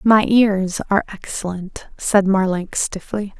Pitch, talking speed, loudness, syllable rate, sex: 200 Hz, 125 wpm, -19 LUFS, 4.0 syllables/s, female